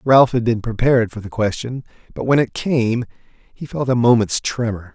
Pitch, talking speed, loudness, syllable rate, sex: 115 Hz, 195 wpm, -18 LUFS, 4.9 syllables/s, male